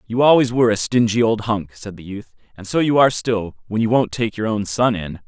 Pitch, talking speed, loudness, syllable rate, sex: 110 Hz, 260 wpm, -18 LUFS, 5.7 syllables/s, male